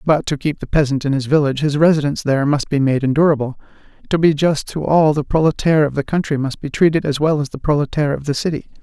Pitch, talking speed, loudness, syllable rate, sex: 145 Hz, 245 wpm, -17 LUFS, 6.8 syllables/s, male